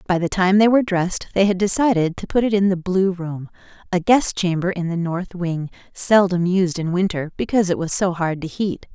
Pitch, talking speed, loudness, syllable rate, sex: 185 Hz, 230 wpm, -19 LUFS, 5.4 syllables/s, female